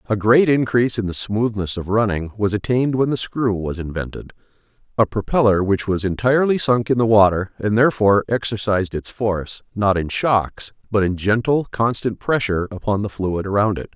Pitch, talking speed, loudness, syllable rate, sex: 105 Hz, 175 wpm, -19 LUFS, 5.4 syllables/s, male